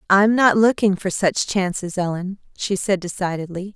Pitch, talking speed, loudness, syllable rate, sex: 190 Hz, 160 wpm, -20 LUFS, 4.7 syllables/s, female